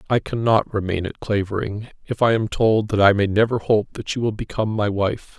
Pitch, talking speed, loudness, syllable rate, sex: 105 Hz, 225 wpm, -21 LUFS, 5.5 syllables/s, male